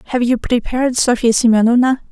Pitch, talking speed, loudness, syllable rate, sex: 240 Hz, 140 wpm, -14 LUFS, 6.1 syllables/s, female